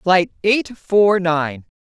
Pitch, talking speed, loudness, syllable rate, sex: 180 Hz, 130 wpm, -17 LUFS, 2.6 syllables/s, female